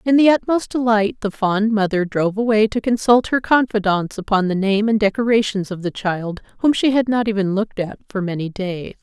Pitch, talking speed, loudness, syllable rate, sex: 210 Hz, 205 wpm, -18 LUFS, 5.4 syllables/s, female